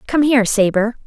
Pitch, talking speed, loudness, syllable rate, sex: 235 Hz, 170 wpm, -15 LUFS, 5.8 syllables/s, female